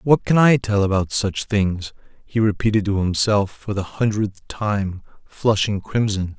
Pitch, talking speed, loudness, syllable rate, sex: 105 Hz, 160 wpm, -20 LUFS, 4.1 syllables/s, male